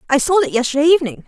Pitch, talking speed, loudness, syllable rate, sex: 275 Hz, 235 wpm, -15 LUFS, 8.3 syllables/s, female